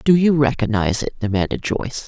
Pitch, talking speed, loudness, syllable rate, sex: 125 Hz, 175 wpm, -19 LUFS, 6.3 syllables/s, female